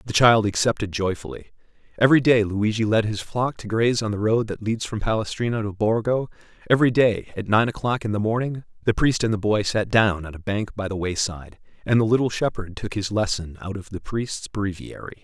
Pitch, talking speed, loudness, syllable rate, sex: 105 Hz, 215 wpm, -22 LUFS, 5.7 syllables/s, male